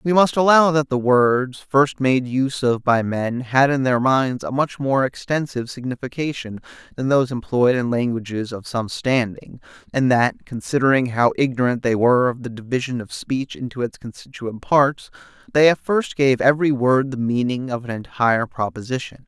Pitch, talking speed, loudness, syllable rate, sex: 130 Hz, 175 wpm, -20 LUFS, 5.0 syllables/s, male